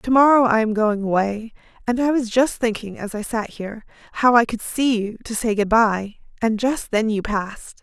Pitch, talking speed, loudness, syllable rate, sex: 225 Hz, 220 wpm, -20 LUFS, 5.0 syllables/s, female